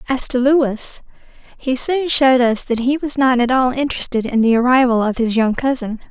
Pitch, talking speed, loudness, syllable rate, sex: 250 Hz, 205 wpm, -16 LUFS, 5.3 syllables/s, female